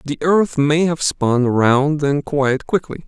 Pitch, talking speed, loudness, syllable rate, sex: 145 Hz, 175 wpm, -17 LUFS, 3.8 syllables/s, male